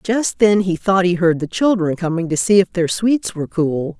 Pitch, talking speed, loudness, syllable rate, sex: 185 Hz, 240 wpm, -17 LUFS, 4.9 syllables/s, female